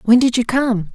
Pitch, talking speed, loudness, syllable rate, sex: 235 Hz, 255 wpm, -16 LUFS, 4.9 syllables/s, female